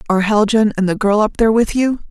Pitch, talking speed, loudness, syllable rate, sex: 210 Hz, 255 wpm, -15 LUFS, 6.7 syllables/s, female